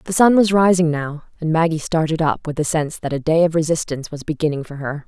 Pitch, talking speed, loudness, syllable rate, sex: 160 Hz, 250 wpm, -19 LUFS, 6.3 syllables/s, female